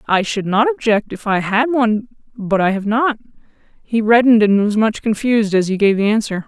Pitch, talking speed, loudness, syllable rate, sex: 215 Hz, 215 wpm, -16 LUFS, 5.5 syllables/s, female